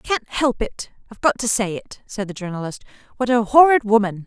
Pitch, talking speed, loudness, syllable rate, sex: 225 Hz, 195 wpm, -19 LUFS, 5.6 syllables/s, female